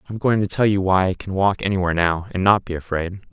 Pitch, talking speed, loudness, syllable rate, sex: 95 Hz, 270 wpm, -20 LUFS, 6.5 syllables/s, male